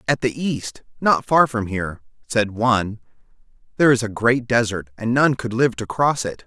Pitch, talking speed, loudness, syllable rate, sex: 120 Hz, 195 wpm, -20 LUFS, 4.9 syllables/s, male